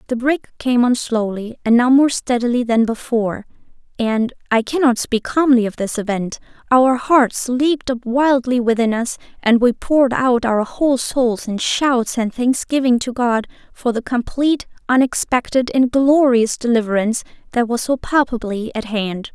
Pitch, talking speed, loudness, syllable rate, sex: 245 Hz, 155 wpm, -17 LUFS, 4.7 syllables/s, female